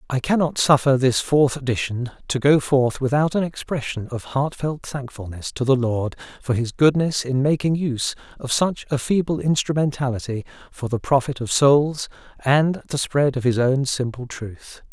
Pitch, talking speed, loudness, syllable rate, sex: 135 Hz, 170 wpm, -21 LUFS, 4.7 syllables/s, male